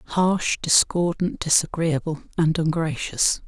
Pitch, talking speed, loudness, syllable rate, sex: 160 Hz, 85 wpm, -22 LUFS, 3.7 syllables/s, male